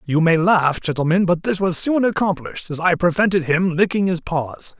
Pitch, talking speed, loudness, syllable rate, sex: 175 Hz, 200 wpm, -18 LUFS, 5.2 syllables/s, male